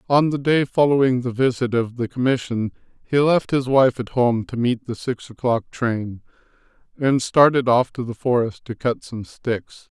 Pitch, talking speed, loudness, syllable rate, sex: 125 Hz, 185 wpm, -20 LUFS, 4.6 syllables/s, male